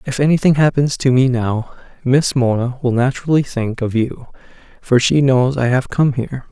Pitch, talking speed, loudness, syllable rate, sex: 130 Hz, 185 wpm, -16 LUFS, 5.1 syllables/s, male